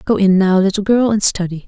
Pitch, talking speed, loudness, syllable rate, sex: 200 Hz, 250 wpm, -14 LUFS, 5.5 syllables/s, female